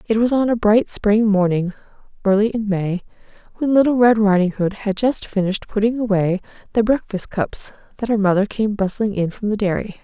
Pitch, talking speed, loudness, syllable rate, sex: 210 Hz, 190 wpm, -19 LUFS, 5.4 syllables/s, female